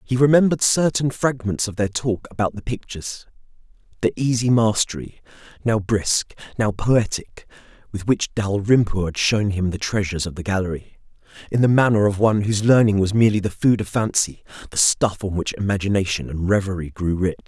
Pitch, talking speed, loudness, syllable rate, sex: 105 Hz, 170 wpm, -20 LUFS, 5.7 syllables/s, male